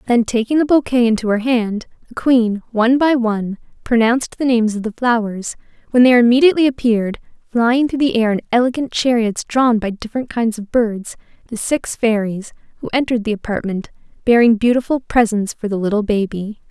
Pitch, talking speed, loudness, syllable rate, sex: 230 Hz, 175 wpm, -16 LUFS, 5.7 syllables/s, female